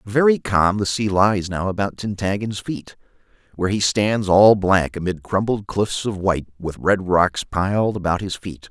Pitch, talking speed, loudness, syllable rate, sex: 100 Hz, 180 wpm, -20 LUFS, 4.6 syllables/s, male